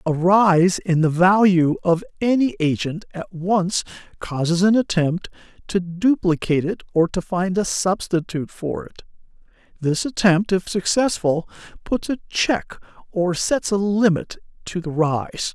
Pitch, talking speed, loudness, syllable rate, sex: 185 Hz, 145 wpm, -20 LUFS, 4.2 syllables/s, male